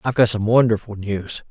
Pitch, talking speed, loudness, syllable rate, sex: 110 Hz, 200 wpm, -19 LUFS, 5.9 syllables/s, female